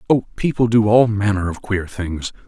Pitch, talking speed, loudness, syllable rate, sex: 105 Hz, 195 wpm, -18 LUFS, 4.9 syllables/s, male